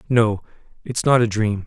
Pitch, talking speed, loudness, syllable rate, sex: 110 Hz, 180 wpm, -19 LUFS, 4.6 syllables/s, male